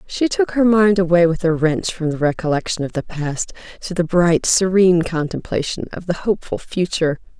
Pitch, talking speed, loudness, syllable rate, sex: 175 Hz, 185 wpm, -18 LUFS, 5.3 syllables/s, female